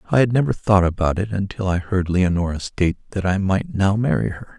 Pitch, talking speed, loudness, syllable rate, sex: 100 Hz, 225 wpm, -20 LUFS, 5.7 syllables/s, male